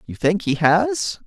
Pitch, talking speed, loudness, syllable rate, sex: 190 Hz, 190 wpm, -19 LUFS, 3.6 syllables/s, male